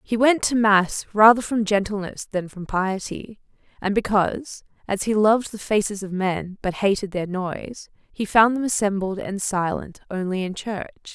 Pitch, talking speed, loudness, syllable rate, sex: 205 Hz, 170 wpm, -22 LUFS, 4.7 syllables/s, female